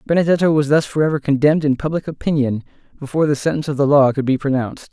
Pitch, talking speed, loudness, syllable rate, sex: 145 Hz, 205 wpm, -17 LUFS, 7.5 syllables/s, male